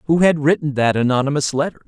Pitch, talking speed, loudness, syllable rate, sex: 145 Hz, 190 wpm, -17 LUFS, 6.6 syllables/s, male